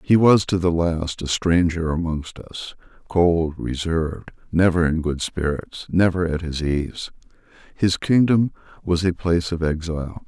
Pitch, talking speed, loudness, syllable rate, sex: 85 Hz, 150 wpm, -21 LUFS, 4.3 syllables/s, male